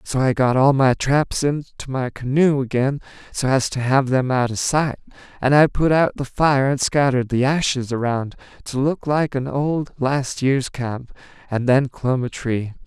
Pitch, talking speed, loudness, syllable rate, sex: 135 Hz, 195 wpm, -20 LUFS, 4.3 syllables/s, male